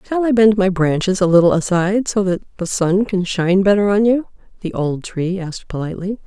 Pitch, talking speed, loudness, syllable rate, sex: 190 Hz, 210 wpm, -17 LUFS, 5.7 syllables/s, female